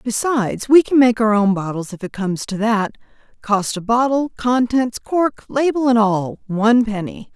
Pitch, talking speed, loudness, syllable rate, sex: 225 Hz, 180 wpm, -18 LUFS, 4.7 syllables/s, female